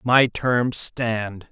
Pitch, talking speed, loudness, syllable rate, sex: 115 Hz, 120 wpm, -21 LUFS, 2.1 syllables/s, male